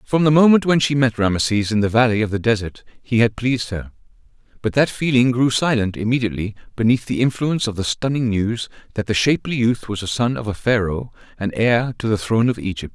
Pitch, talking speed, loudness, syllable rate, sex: 115 Hz, 220 wpm, -19 LUFS, 6.0 syllables/s, male